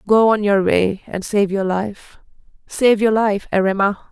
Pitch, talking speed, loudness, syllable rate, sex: 205 Hz, 175 wpm, -17 LUFS, 4.2 syllables/s, female